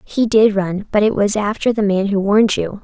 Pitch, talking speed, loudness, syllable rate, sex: 205 Hz, 255 wpm, -16 LUFS, 5.2 syllables/s, female